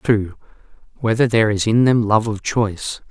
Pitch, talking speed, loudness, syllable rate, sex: 110 Hz, 175 wpm, -18 LUFS, 6.0 syllables/s, male